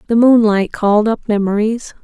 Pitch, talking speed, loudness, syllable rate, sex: 215 Hz, 145 wpm, -14 LUFS, 5.3 syllables/s, female